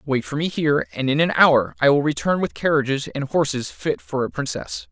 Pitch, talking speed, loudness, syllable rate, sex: 145 Hz, 230 wpm, -21 LUFS, 5.2 syllables/s, male